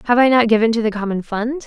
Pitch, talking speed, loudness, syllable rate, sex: 230 Hz, 290 wpm, -17 LUFS, 6.7 syllables/s, female